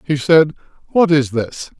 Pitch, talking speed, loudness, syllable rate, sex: 150 Hz, 165 wpm, -15 LUFS, 4.2 syllables/s, male